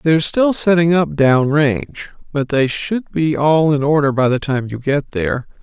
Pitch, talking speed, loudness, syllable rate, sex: 145 Hz, 205 wpm, -16 LUFS, 4.6 syllables/s, female